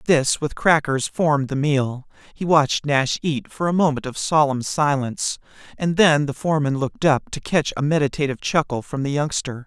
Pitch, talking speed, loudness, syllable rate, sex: 145 Hz, 185 wpm, -21 LUFS, 5.3 syllables/s, male